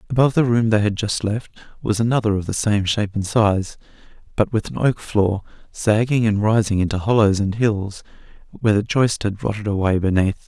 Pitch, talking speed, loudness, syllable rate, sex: 105 Hz, 195 wpm, -19 LUFS, 5.5 syllables/s, male